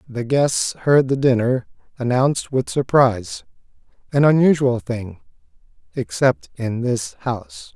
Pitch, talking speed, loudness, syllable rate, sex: 125 Hz, 110 wpm, -19 LUFS, 4.2 syllables/s, male